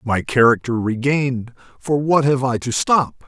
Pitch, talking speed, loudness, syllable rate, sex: 125 Hz, 165 wpm, -18 LUFS, 4.4 syllables/s, male